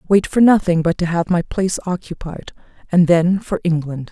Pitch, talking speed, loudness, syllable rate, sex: 175 Hz, 190 wpm, -17 LUFS, 5.3 syllables/s, female